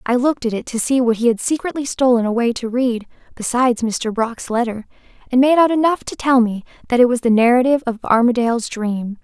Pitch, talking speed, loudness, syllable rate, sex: 240 Hz, 215 wpm, -17 LUFS, 6.0 syllables/s, female